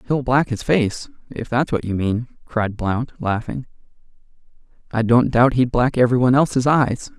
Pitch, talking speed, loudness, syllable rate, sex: 125 Hz, 165 wpm, -19 LUFS, 4.6 syllables/s, male